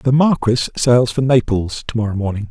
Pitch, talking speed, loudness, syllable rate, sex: 120 Hz, 190 wpm, -16 LUFS, 5.2 syllables/s, male